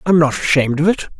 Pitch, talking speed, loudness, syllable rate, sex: 155 Hz, 250 wpm, -15 LUFS, 7.1 syllables/s, male